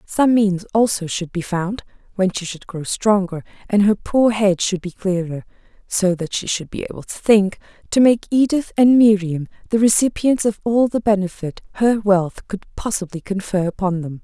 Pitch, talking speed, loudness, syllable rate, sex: 200 Hz, 175 wpm, -18 LUFS, 4.8 syllables/s, female